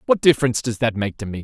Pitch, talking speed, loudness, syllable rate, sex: 115 Hz, 295 wpm, -20 LUFS, 8.0 syllables/s, male